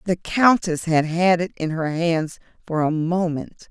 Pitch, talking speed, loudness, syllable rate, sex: 170 Hz, 180 wpm, -21 LUFS, 4.0 syllables/s, female